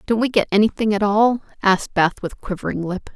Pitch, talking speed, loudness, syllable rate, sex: 205 Hz, 210 wpm, -19 LUFS, 5.8 syllables/s, female